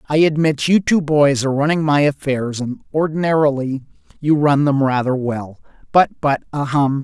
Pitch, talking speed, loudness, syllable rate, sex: 145 Hz, 145 wpm, -17 LUFS, 4.8 syllables/s, male